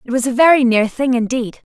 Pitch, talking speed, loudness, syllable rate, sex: 250 Hz, 240 wpm, -15 LUFS, 5.8 syllables/s, female